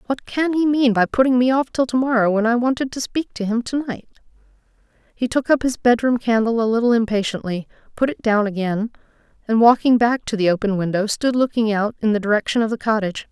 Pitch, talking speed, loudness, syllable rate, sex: 230 Hz, 220 wpm, -19 LUFS, 6.0 syllables/s, female